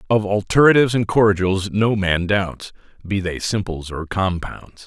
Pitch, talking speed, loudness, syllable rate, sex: 100 Hz, 150 wpm, -19 LUFS, 4.4 syllables/s, male